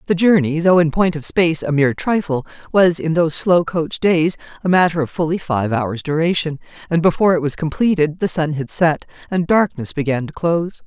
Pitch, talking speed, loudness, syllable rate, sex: 165 Hz, 200 wpm, -17 LUFS, 5.5 syllables/s, female